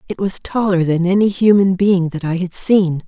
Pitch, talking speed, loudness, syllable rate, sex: 185 Hz, 215 wpm, -15 LUFS, 4.9 syllables/s, female